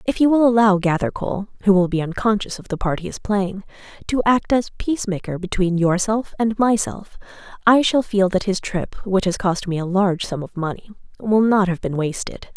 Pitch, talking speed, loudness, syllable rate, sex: 200 Hz, 205 wpm, -20 LUFS, 5.4 syllables/s, female